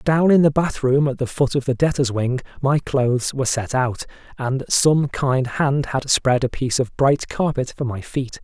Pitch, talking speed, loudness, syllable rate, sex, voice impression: 135 Hz, 215 wpm, -20 LUFS, 4.7 syllables/s, male, masculine, adult-like, slightly thick, fluent, cool, slightly refreshing, sincere, slightly kind